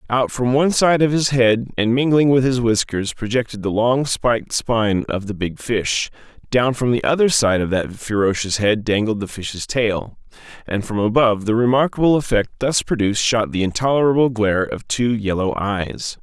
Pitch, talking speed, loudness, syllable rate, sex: 115 Hz, 185 wpm, -18 LUFS, 5.0 syllables/s, male